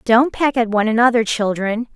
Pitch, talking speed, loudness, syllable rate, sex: 230 Hz, 185 wpm, -17 LUFS, 5.5 syllables/s, female